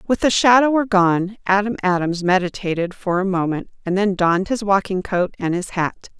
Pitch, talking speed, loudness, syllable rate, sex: 195 Hz, 185 wpm, -19 LUFS, 5.2 syllables/s, female